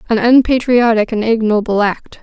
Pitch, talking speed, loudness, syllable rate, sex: 225 Hz, 135 wpm, -13 LUFS, 4.9 syllables/s, female